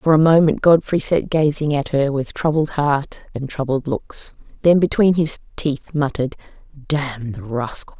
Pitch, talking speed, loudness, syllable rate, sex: 145 Hz, 165 wpm, -19 LUFS, 4.4 syllables/s, female